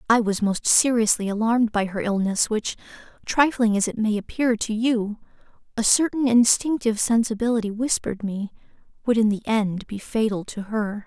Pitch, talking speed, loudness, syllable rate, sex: 220 Hz, 165 wpm, -22 LUFS, 5.2 syllables/s, female